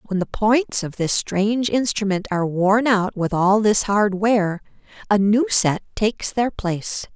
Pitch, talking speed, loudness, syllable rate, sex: 205 Hz, 175 wpm, -20 LUFS, 4.3 syllables/s, female